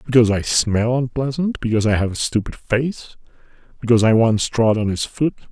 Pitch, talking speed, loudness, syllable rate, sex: 120 Hz, 185 wpm, -18 LUFS, 5.6 syllables/s, male